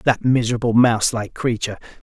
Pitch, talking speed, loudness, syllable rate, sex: 115 Hz, 115 wpm, -19 LUFS, 7.1 syllables/s, male